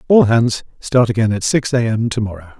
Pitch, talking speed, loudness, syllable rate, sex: 115 Hz, 230 wpm, -16 LUFS, 5.4 syllables/s, male